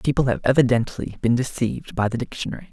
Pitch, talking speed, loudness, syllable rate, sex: 125 Hz, 175 wpm, -22 LUFS, 6.7 syllables/s, male